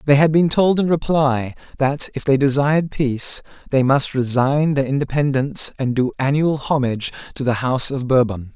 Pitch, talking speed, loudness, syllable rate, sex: 135 Hz, 175 wpm, -19 LUFS, 5.2 syllables/s, male